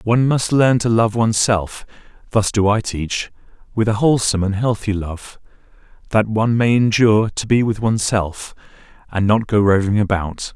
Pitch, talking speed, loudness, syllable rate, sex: 110 Hz, 155 wpm, -17 LUFS, 5.2 syllables/s, male